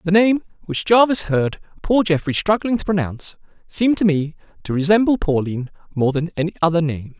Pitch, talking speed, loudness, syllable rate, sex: 175 Hz, 175 wpm, -19 LUFS, 5.8 syllables/s, male